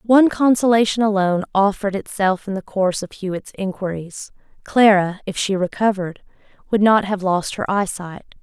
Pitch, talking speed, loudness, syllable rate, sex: 200 Hz, 150 wpm, -19 LUFS, 5.3 syllables/s, female